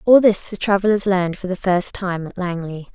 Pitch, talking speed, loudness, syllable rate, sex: 190 Hz, 225 wpm, -19 LUFS, 5.3 syllables/s, female